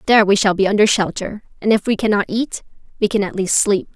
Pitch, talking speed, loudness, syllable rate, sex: 205 Hz, 245 wpm, -17 LUFS, 6.3 syllables/s, female